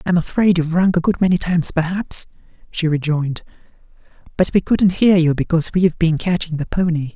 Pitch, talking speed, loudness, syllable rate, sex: 170 Hz, 185 wpm, -17 LUFS, 6.1 syllables/s, male